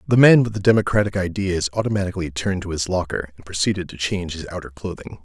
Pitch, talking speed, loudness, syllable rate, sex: 90 Hz, 205 wpm, -21 LUFS, 6.9 syllables/s, male